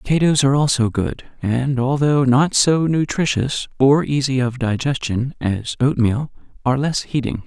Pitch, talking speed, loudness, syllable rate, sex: 135 Hz, 145 wpm, -18 LUFS, 4.6 syllables/s, male